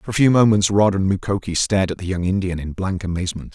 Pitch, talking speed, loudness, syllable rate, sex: 95 Hz, 255 wpm, -19 LUFS, 6.6 syllables/s, male